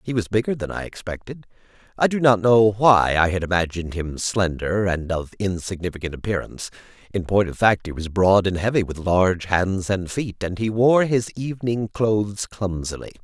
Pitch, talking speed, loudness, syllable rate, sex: 100 Hz, 185 wpm, -21 LUFS, 5.2 syllables/s, male